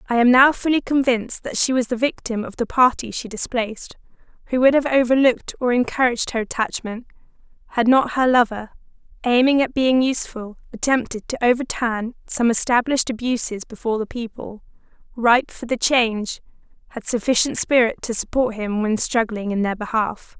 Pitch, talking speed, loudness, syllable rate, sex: 240 Hz, 160 wpm, -20 LUFS, 5.5 syllables/s, female